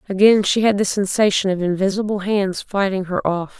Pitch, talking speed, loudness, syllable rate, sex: 195 Hz, 185 wpm, -18 LUFS, 5.3 syllables/s, female